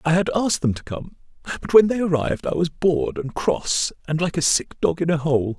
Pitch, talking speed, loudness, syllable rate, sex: 160 Hz, 245 wpm, -21 LUFS, 5.5 syllables/s, male